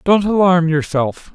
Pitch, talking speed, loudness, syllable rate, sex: 170 Hz, 135 wpm, -15 LUFS, 4.0 syllables/s, male